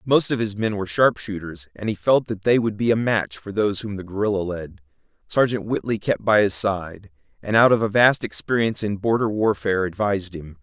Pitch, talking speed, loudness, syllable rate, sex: 100 Hz, 215 wpm, -21 LUFS, 5.6 syllables/s, male